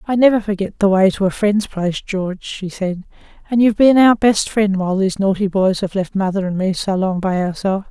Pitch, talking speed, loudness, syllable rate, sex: 195 Hz, 235 wpm, -17 LUFS, 5.8 syllables/s, female